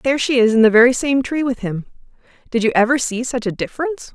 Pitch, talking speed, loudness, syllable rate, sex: 245 Hz, 245 wpm, -17 LUFS, 6.8 syllables/s, female